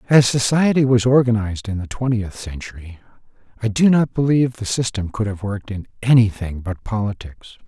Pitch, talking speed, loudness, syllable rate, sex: 110 Hz, 165 wpm, -19 LUFS, 5.6 syllables/s, male